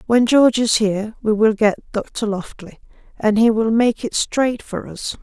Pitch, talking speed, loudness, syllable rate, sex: 220 Hz, 195 wpm, -18 LUFS, 4.3 syllables/s, female